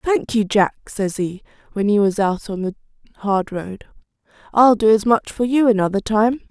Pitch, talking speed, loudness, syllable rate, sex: 215 Hz, 195 wpm, -18 LUFS, 4.6 syllables/s, female